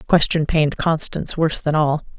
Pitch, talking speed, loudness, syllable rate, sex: 155 Hz, 190 wpm, -19 LUFS, 5.9 syllables/s, female